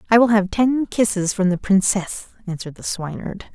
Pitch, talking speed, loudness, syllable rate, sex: 200 Hz, 185 wpm, -19 LUFS, 5.5 syllables/s, female